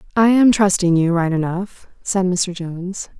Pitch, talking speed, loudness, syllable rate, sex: 185 Hz, 170 wpm, -17 LUFS, 4.5 syllables/s, female